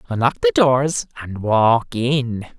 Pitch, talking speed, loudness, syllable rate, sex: 135 Hz, 140 wpm, -18 LUFS, 3.3 syllables/s, male